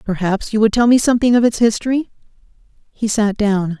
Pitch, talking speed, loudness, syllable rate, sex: 220 Hz, 190 wpm, -16 LUFS, 5.9 syllables/s, female